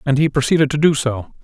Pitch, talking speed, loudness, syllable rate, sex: 140 Hz, 250 wpm, -17 LUFS, 6.4 syllables/s, male